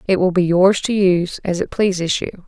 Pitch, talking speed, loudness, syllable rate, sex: 185 Hz, 245 wpm, -17 LUFS, 5.2 syllables/s, female